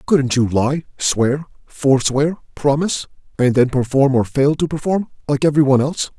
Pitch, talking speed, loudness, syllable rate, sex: 140 Hz, 155 wpm, -17 LUFS, 4.9 syllables/s, male